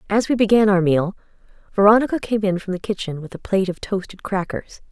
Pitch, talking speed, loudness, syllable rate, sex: 200 Hz, 210 wpm, -20 LUFS, 6.1 syllables/s, female